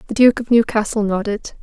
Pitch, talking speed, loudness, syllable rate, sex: 220 Hz, 185 wpm, -17 LUFS, 5.7 syllables/s, female